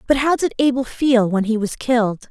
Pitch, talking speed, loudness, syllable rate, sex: 240 Hz, 235 wpm, -18 LUFS, 5.3 syllables/s, female